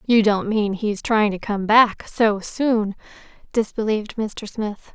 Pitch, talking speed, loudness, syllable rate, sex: 215 Hz, 160 wpm, -21 LUFS, 4.0 syllables/s, female